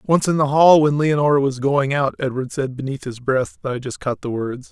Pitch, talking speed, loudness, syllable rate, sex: 135 Hz, 240 wpm, -19 LUFS, 5.3 syllables/s, male